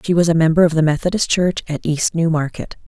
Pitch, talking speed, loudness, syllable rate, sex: 165 Hz, 245 wpm, -17 LUFS, 6.0 syllables/s, female